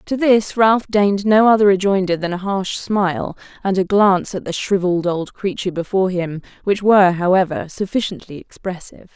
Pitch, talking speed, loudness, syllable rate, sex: 190 Hz, 170 wpm, -17 LUFS, 5.5 syllables/s, female